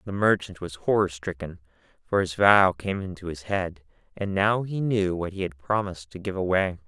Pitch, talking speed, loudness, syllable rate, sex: 95 Hz, 200 wpm, -25 LUFS, 5.1 syllables/s, male